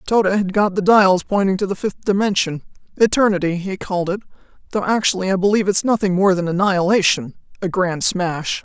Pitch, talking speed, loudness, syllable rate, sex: 190 Hz, 175 wpm, -18 LUFS, 5.7 syllables/s, female